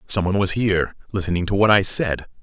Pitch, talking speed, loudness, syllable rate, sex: 95 Hz, 200 wpm, -20 LUFS, 6.6 syllables/s, male